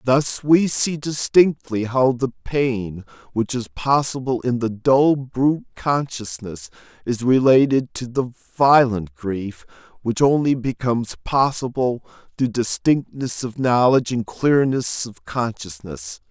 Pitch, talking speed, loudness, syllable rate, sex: 125 Hz, 120 wpm, -20 LUFS, 3.8 syllables/s, male